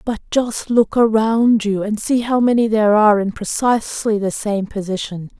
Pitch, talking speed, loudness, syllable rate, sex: 215 Hz, 180 wpm, -17 LUFS, 4.9 syllables/s, female